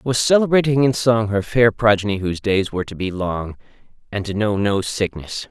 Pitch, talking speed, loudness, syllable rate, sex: 105 Hz, 195 wpm, -19 LUFS, 5.3 syllables/s, male